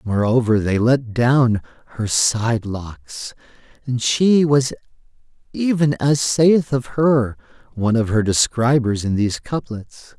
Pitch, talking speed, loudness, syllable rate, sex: 120 Hz, 130 wpm, -18 LUFS, 3.7 syllables/s, male